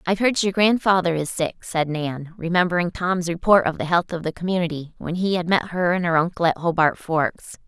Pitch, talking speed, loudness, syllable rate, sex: 175 Hz, 220 wpm, -21 LUFS, 5.4 syllables/s, female